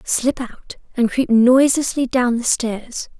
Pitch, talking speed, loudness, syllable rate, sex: 245 Hz, 150 wpm, -17 LUFS, 3.9 syllables/s, female